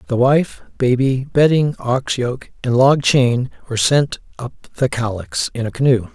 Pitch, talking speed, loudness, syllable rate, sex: 125 Hz, 165 wpm, -17 LUFS, 4.3 syllables/s, male